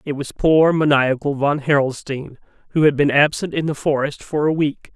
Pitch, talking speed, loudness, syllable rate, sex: 145 Hz, 195 wpm, -18 LUFS, 4.9 syllables/s, male